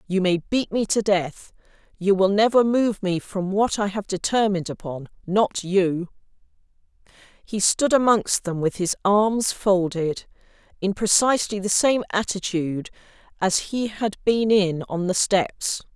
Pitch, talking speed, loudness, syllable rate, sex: 200 Hz, 145 wpm, -22 LUFS, 4.2 syllables/s, female